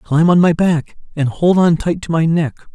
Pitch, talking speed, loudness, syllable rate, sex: 165 Hz, 240 wpm, -15 LUFS, 5.2 syllables/s, male